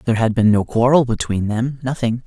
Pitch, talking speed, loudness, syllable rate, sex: 120 Hz, 210 wpm, -17 LUFS, 5.8 syllables/s, male